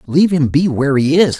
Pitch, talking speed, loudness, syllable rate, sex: 150 Hz, 260 wpm, -14 LUFS, 6.4 syllables/s, male